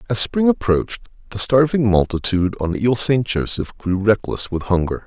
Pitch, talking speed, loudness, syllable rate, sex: 110 Hz, 165 wpm, -19 LUFS, 5.4 syllables/s, male